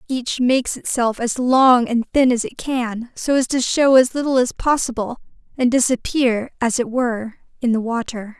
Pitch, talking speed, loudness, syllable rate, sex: 245 Hz, 185 wpm, -18 LUFS, 4.7 syllables/s, female